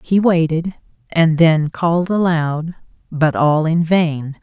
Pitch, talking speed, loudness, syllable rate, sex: 165 Hz, 135 wpm, -16 LUFS, 3.5 syllables/s, female